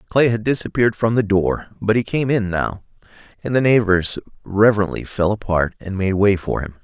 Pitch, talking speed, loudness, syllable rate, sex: 100 Hz, 195 wpm, -19 LUFS, 5.4 syllables/s, male